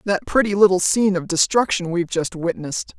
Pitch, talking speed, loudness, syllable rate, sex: 185 Hz, 180 wpm, -19 LUFS, 6.1 syllables/s, female